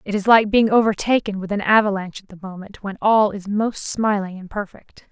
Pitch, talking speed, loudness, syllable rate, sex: 205 Hz, 210 wpm, -19 LUFS, 5.5 syllables/s, female